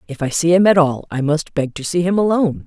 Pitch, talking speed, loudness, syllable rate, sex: 155 Hz, 290 wpm, -17 LUFS, 6.1 syllables/s, female